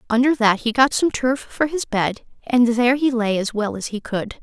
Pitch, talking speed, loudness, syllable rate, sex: 240 Hz, 245 wpm, -19 LUFS, 5.0 syllables/s, female